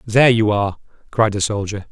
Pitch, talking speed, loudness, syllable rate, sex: 105 Hz, 190 wpm, -17 LUFS, 6.0 syllables/s, male